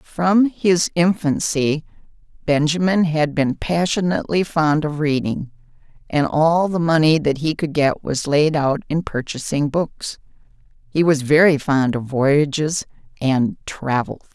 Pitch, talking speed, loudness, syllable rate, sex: 155 Hz, 135 wpm, -19 LUFS, 4.0 syllables/s, female